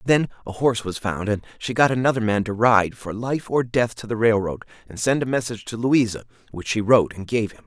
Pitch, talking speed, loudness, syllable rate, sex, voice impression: 115 Hz, 245 wpm, -22 LUFS, 5.8 syllables/s, male, masculine, adult-like, tensed, powerful, slightly bright, clear, fluent, cool, friendly, wild, lively, slightly intense